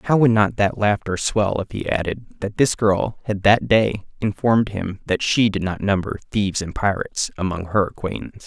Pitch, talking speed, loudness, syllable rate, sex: 105 Hz, 200 wpm, -20 LUFS, 5.1 syllables/s, male